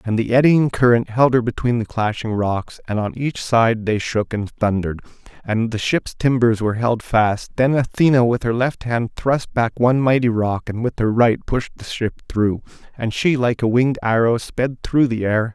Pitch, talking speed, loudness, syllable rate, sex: 115 Hz, 210 wpm, -19 LUFS, 4.8 syllables/s, male